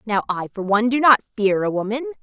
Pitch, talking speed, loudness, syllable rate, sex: 225 Hz, 245 wpm, -19 LUFS, 6.6 syllables/s, female